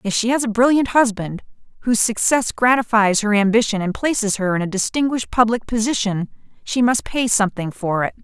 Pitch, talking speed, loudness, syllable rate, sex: 225 Hz, 180 wpm, -18 LUFS, 5.7 syllables/s, female